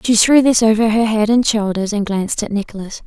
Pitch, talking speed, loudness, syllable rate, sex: 215 Hz, 235 wpm, -15 LUFS, 5.7 syllables/s, female